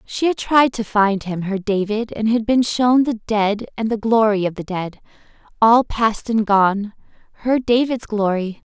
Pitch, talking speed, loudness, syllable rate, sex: 215 Hz, 170 wpm, -18 LUFS, 4.2 syllables/s, female